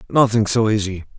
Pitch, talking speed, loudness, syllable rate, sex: 110 Hz, 150 wpm, -18 LUFS, 5.6 syllables/s, male